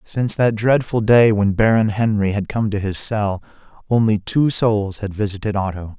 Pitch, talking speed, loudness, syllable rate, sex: 105 Hz, 180 wpm, -18 LUFS, 4.8 syllables/s, male